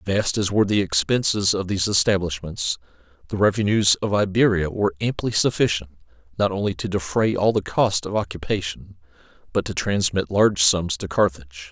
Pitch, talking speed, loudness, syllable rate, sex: 95 Hz, 160 wpm, -21 LUFS, 5.5 syllables/s, male